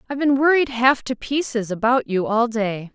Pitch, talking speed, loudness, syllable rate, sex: 240 Hz, 205 wpm, -20 LUFS, 5.1 syllables/s, female